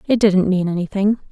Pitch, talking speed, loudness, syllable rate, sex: 195 Hz, 185 wpm, -17 LUFS, 5.4 syllables/s, female